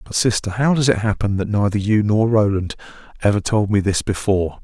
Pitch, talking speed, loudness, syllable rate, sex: 105 Hz, 205 wpm, -18 LUFS, 5.7 syllables/s, male